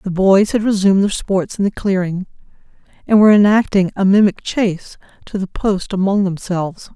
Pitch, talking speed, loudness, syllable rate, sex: 195 Hz, 175 wpm, -15 LUFS, 5.4 syllables/s, female